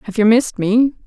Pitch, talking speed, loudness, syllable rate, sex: 225 Hz, 225 wpm, -15 LUFS, 6.3 syllables/s, female